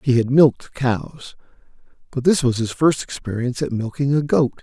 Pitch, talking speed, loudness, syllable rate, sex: 130 Hz, 180 wpm, -19 LUFS, 5.5 syllables/s, male